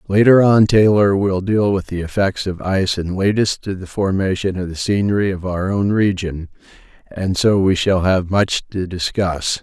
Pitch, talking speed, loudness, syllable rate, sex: 95 Hz, 195 wpm, -17 LUFS, 4.7 syllables/s, male